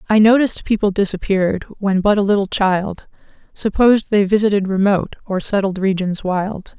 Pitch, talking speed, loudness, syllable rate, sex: 200 Hz, 150 wpm, -17 LUFS, 5.3 syllables/s, female